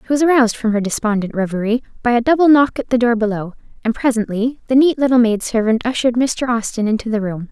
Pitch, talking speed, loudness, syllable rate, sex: 235 Hz, 225 wpm, -16 LUFS, 6.5 syllables/s, female